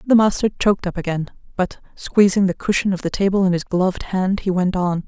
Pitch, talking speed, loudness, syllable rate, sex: 190 Hz, 225 wpm, -19 LUFS, 5.9 syllables/s, female